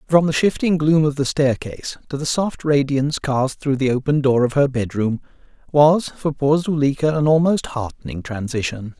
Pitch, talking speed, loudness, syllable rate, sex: 140 Hz, 185 wpm, -19 LUFS, 4.8 syllables/s, male